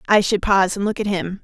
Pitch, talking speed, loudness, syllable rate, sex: 195 Hz, 290 wpm, -19 LUFS, 6.3 syllables/s, female